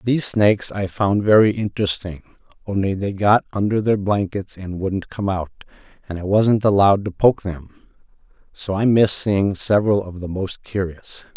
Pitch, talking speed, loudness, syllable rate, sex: 100 Hz, 170 wpm, -19 LUFS, 5.1 syllables/s, male